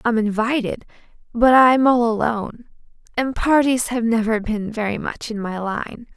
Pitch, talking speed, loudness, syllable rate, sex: 230 Hz, 135 wpm, -19 LUFS, 4.5 syllables/s, female